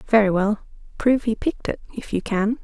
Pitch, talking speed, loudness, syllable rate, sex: 215 Hz, 205 wpm, -22 LUFS, 6.4 syllables/s, female